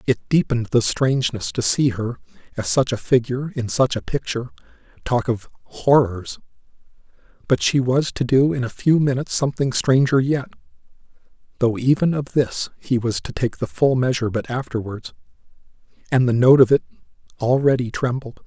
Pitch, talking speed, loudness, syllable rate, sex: 130 Hz, 155 wpm, -20 LUFS, 5.3 syllables/s, male